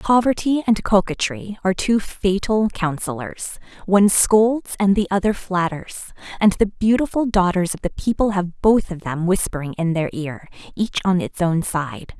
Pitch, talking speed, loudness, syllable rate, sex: 190 Hz, 160 wpm, -20 LUFS, 4.6 syllables/s, female